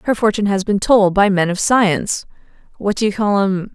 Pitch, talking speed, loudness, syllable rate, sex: 200 Hz, 210 wpm, -16 LUFS, 5.5 syllables/s, female